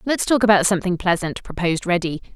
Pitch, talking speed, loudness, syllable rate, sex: 185 Hz, 180 wpm, -19 LUFS, 6.6 syllables/s, female